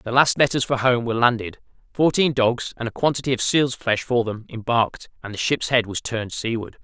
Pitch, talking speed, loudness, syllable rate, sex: 120 Hz, 220 wpm, -21 LUFS, 5.7 syllables/s, male